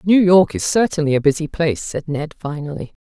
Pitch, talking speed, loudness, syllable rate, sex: 160 Hz, 195 wpm, -18 LUFS, 5.7 syllables/s, female